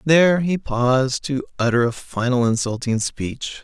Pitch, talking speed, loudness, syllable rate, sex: 130 Hz, 150 wpm, -20 LUFS, 4.5 syllables/s, male